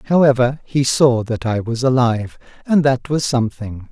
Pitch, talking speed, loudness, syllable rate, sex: 125 Hz, 170 wpm, -17 LUFS, 5.0 syllables/s, male